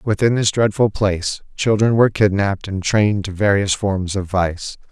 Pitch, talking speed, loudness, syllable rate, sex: 100 Hz, 170 wpm, -18 LUFS, 5.0 syllables/s, male